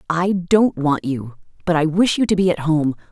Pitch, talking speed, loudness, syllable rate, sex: 170 Hz, 230 wpm, -18 LUFS, 4.7 syllables/s, female